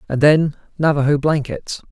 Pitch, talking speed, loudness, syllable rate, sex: 145 Hz, 125 wpm, -17 LUFS, 4.8 syllables/s, male